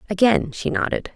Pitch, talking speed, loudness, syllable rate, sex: 210 Hz, 155 wpm, -21 LUFS, 5.3 syllables/s, female